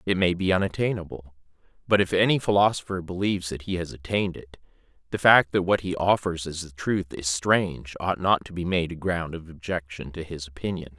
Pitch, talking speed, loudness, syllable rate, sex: 85 Hz, 200 wpm, -25 LUFS, 5.6 syllables/s, male